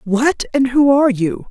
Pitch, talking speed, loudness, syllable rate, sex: 250 Hz, 200 wpm, -15 LUFS, 4.5 syllables/s, female